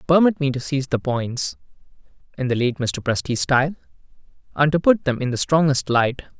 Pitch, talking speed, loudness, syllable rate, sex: 140 Hz, 190 wpm, -20 LUFS, 4.4 syllables/s, male